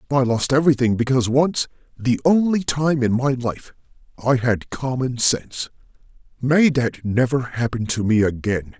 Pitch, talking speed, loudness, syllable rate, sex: 125 Hz, 135 wpm, -20 LUFS, 4.7 syllables/s, male